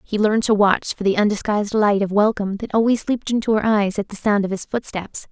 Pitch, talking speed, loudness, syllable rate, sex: 210 Hz, 250 wpm, -19 LUFS, 6.2 syllables/s, female